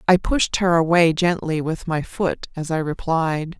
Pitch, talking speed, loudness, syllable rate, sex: 165 Hz, 185 wpm, -20 LUFS, 4.2 syllables/s, female